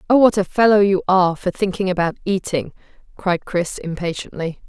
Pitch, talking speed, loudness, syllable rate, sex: 185 Hz, 165 wpm, -19 LUFS, 5.4 syllables/s, female